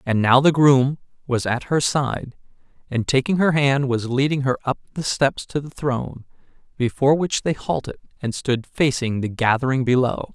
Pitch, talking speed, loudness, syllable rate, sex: 135 Hz, 180 wpm, -21 LUFS, 4.8 syllables/s, male